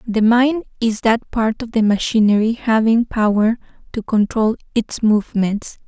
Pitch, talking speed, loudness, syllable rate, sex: 220 Hz, 145 wpm, -17 LUFS, 4.4 syllables/s, female